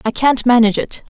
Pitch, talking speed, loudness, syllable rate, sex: 240 Hz, 205 wpm, -14 LUFS, 6.2 syllables/s, female